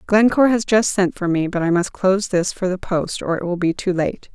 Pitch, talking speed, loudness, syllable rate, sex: 190 Hz, 275 wpm, -19 LUFS, 5.5 syllables/s, female